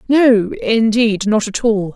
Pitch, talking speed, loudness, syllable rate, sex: 220 Hz, 155 wpm, -15 LUFS, 3.5 syllables/s, female